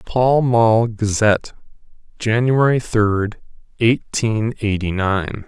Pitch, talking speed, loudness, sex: 110 Hz, 90 wpm, -18 LUFS, male